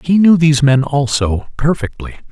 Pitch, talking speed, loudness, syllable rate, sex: 145 Hz, 155 wpm, -13 LUFS, 5.1 syllables/s, male